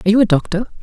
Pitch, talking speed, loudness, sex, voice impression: 205 Hz, 290 wpm, -16 LUFS, female, feminine, slightly adult-like, intellectual, slightly calm, slightly strict, sharp, slightly modest